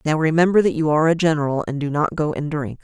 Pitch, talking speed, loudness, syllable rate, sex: 155 Hz, 275 wpm, -19 LUFS, 6.7 syllables/s, female